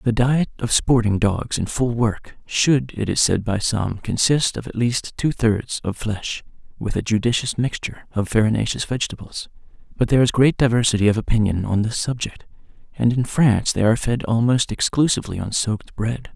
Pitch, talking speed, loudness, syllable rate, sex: 115 Hz, 185 wpm, -20 LUFS, 5.2 syllables/s, male